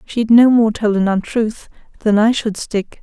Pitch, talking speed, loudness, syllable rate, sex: 220 Hz, 200 wpm, -15 LUFS, 4.3 syllables/s, female